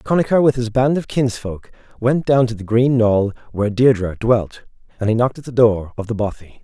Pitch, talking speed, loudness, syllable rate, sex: 115 Hz, 215 wpm, -18 LUFS, 5.5 syllables/s, male